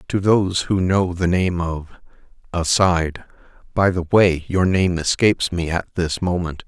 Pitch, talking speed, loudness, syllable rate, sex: 90 Hz, 160 wpm, -19 LUFS, 4.4 syllables/s, male